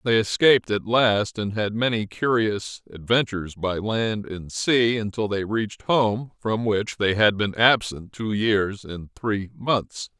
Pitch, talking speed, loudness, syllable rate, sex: 105 Hz, 165 wpm, -23 LUFS, 4.0 syllables/s, male